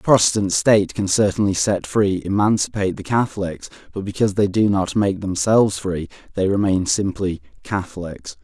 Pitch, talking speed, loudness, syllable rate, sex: 95 Hz, 150 wpm, -19 LUFS, 5.2 syllables/s, male